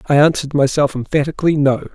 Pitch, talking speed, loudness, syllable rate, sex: 145 Hz, 155 wpm, -16 LUFS, 6.7 syllables/s, male